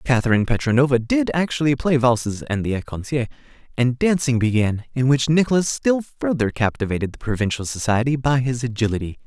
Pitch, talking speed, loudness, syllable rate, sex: 125 Hz, 155 wpm, -20 LUFS, 6.0 syllables/s, male